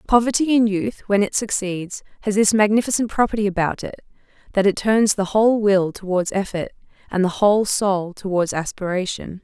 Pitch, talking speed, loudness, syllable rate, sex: 200 Hz, 165 wpm, -20 LUFS, 5.2 syllables/s, female